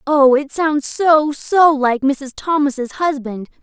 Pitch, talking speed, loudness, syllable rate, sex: 285 Hz, 115 wpm, -16 LUFS, 3.3 syllables/s, female